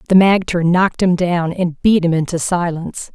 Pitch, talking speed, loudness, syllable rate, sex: 175 Hz, 190 wpm, -16 LUFS, 5.1 syllables/s, female